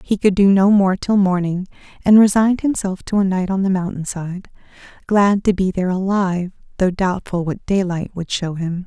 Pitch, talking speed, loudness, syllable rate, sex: 190 Hz, 195 wpm, -18 LUFS, 5.2 syllables/s, female